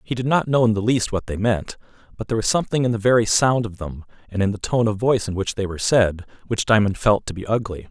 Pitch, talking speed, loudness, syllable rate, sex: 110 Hz, 280 wpm, -20 LUFS, 6.5 syllables/s, male